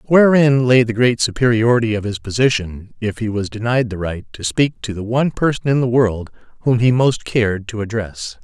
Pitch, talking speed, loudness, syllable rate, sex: 115 Hz, 205 wpm, -17 LUFS, 5.3 syllables/s, male